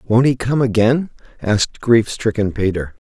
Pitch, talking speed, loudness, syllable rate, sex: 115 Hz, 155 wpm, -17 LUFS, 4.8 syllables/s, male